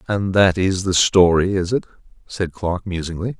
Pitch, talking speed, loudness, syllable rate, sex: 95 Hz, 175 wpm, -18 LUFS, 5.0 syllables/s, male